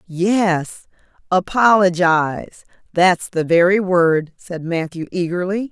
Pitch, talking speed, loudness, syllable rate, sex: 180 Hz, 75 wpm, -17 LUFS, 3.7 syllables/s, female